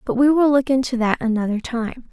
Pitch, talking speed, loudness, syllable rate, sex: 250 Hz, 225 wpm, -19 LUFS, 5.6 syllables/s, female